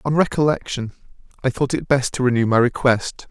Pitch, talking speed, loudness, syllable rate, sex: 125 Hz, 180 wpm, -20 LUFS, 5.5 syllables/s, male